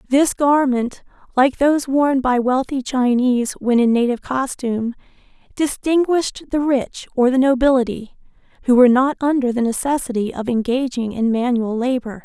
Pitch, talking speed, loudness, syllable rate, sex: 255 Hz, 140 wpm, -18 LUFS, 5.1 syllables/s, female